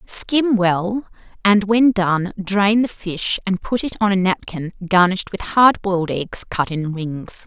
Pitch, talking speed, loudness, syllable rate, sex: 195 Hz, 175 wpm, -18 LUFS, 3.9 syllables/s, female